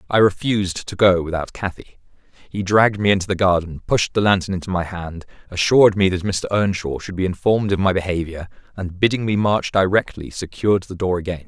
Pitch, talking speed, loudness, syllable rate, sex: 95 Hz, 200 wpm, -19 LUFS, 5.8 syllables/s, male